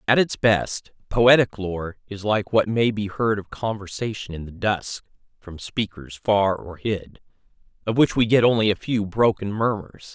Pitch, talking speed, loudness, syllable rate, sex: 105 Hz, 175 wpm, -22 LUFS, 4.3 syllables/s, male